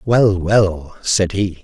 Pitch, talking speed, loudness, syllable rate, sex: 95 Hz, 145 wpm, -16 LUFS, 2.7 syllables/s, male